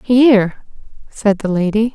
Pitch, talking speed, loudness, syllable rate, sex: 215 Hz, 125 wpm, -15 LUFS, 4.3 syllables/s, female